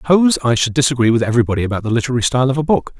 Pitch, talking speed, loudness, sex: 125 Hz, 260 wpm, -16 LUFS, male